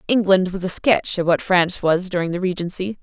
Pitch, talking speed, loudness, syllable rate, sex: 185 Hz, 220 wpm, -19 LUFS, 5.6 syllables/s, female